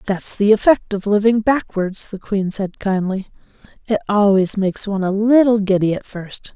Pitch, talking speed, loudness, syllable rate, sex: 205 Hz, 175 wpm, -17 LUFS, 4.9 syllables/s, female